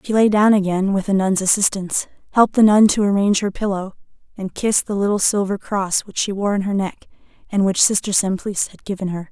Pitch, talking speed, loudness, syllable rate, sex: 200 Hz, 220 wpm, -18 LUFS, 6.0 syllables/s, female